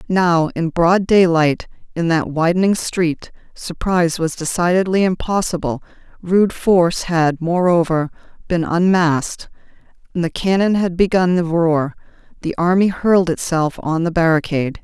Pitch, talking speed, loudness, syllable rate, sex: 170 Hz, 125 wpm, -17 LUFS, 4.5 syllables/s, female